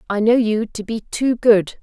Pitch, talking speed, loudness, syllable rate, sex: 220 Hz, 230 wpm, -18 LUFS, 4.4 syllables/s, female